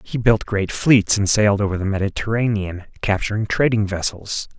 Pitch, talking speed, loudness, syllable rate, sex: 105 Hz, 155 wpm, -19 LUFS, 5.2 syllables/s, male